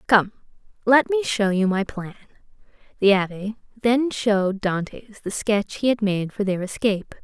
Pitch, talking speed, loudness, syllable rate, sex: 210 Hz, 165 wpm, -22 LUFS, 4.6 syllables/s, female